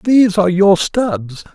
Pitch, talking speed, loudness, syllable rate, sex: 195 Hz, 155 wpm, -14 LUFS, 4.4 syllables/s, male